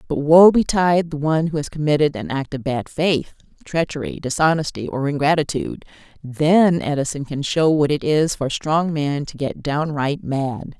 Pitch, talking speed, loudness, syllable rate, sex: 150 Hz, 180 wpm, -19 LUFS, 4.9 syllables/s, female